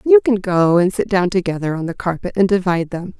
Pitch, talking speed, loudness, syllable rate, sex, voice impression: 190 Hz, 245 wpm, -17 LUFS, 5.9 syllables/s, female, feminine, gender-neutral, adult-like, slightly middle-aged, very thin, slightly tensed, slightly weak, very bright, slightly soft, clear, fluent, slightly cute, intellectual, very refreshing, sincere, very calm, friendly, reassuring, unique, elegant, sweet, lively, very kind